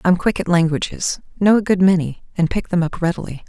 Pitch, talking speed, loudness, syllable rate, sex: 180 Hz, 225 wpm, -18 LUFS, 5.9 syllables/s, female